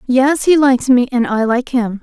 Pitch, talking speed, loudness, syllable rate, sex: 250 Hz, 235 wpm, -13 LUFS, 4.8 syllables/s, female